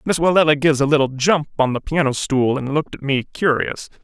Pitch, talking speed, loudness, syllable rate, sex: 145 Hz, 225 wpm, -18 LUFS, 5.9 syllables/s, male